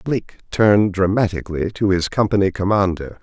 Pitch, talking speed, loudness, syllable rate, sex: 100 Hz, 130 wpm, -18 LUFS, 5.7 syllables/s, male